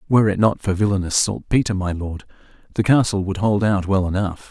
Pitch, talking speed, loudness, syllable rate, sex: 100 Hz, 200 wpm, -20 LUFS, 5.8 syllables/s, male